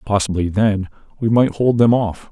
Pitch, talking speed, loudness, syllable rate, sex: 105 Hz, 180 wpm, -17 LUFS, 4.8 syllables/s, male